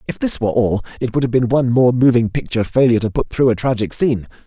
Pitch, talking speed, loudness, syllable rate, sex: 120 Hz, 255 wpm, -16 LUFS, 7.1 syllables/s, male